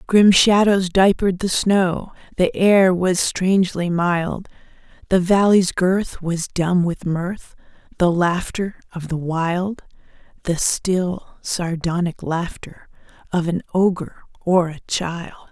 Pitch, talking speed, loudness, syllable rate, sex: 180 Hz, 125 wpm, -19 LUFS, 3.6 syllables/s, female